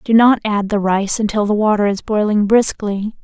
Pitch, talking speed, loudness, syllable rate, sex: 210 Hz, 205 wpm, -16 LUFS, 4.9 syllables/s, female